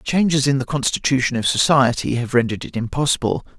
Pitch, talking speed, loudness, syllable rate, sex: 130 Hz, 165 wpm, -19 LUFS, 6.1 syllables/s, male